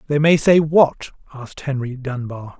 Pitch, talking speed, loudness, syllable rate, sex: 140 Hz, 160 wpm, -17 LUFS, 4.6 syllables/s, male